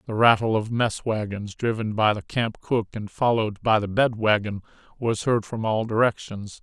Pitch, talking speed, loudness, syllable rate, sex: 110 Hz, 190 wpm, -23 LUFS, 4.9 syllables/s, male